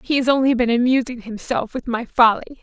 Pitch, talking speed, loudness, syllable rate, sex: 245 Hz, 205 wpm, -19 LUFS, 5.9 syllables/s, female